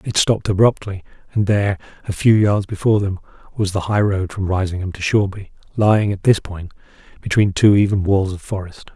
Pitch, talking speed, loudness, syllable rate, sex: 100 Hz, 190 wpm, -18 LUFS, 5.9 syllables/s, male